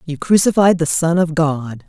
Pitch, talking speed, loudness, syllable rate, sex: 165 Hz, 190 wpm, -15 LUFS, 4.6 syllables/s, female